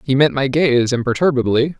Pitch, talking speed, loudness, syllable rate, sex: 135 Hz, 165 wpm, -16 LUFS, 5.3 syllables/s, male